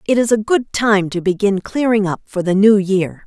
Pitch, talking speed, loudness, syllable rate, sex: 205 Hz, 240 wpm, -16 LUFS, 4.9 syllables/s, female